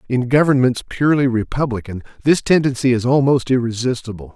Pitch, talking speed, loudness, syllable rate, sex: 125 Hz, 125 wpm, -17 LUFS, 5.9 syllables/s, male